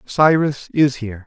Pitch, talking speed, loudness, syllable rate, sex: 140 Hz, 140 wpm, -17 LUFS, 4.5 syllables/s, male